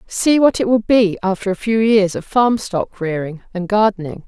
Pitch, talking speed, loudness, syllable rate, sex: 205 Hz, 210 wpm, -17 LUFS, 4.8 syllables/s, female